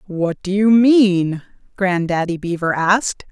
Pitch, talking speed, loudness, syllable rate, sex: 190 Hz, 125 wpm, -16 LUFS, 3.9 syllables/s, female